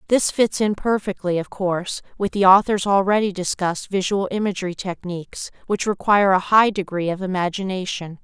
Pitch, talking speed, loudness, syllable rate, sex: 190 Hz, 155 wpm, -20 LUFS, 5.5 syllables/s, female